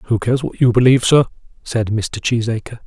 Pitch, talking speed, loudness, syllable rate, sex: 115 Hz, 190 wpm, -16 LUFS, 5.8 syllables/s, male